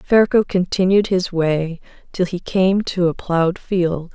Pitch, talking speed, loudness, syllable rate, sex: 180 Hz, 160 wpm, -18 LUFS, 4.1 syllables/s, female